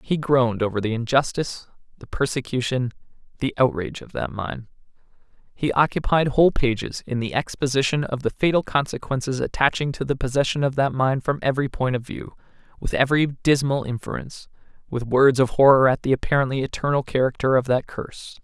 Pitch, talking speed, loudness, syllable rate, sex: 130 Hz, 165 wpm, -22 LUFS, 5.9 syllables/s, male